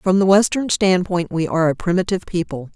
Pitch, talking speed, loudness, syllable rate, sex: 180 Hz, 195 wpm, -18 LUFS, 6.0 syllables/s, female